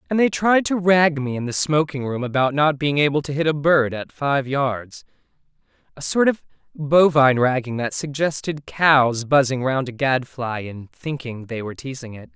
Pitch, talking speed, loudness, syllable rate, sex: 140 Hz, 190 wpm, -20 LUFS, 4.8 syllables/s, male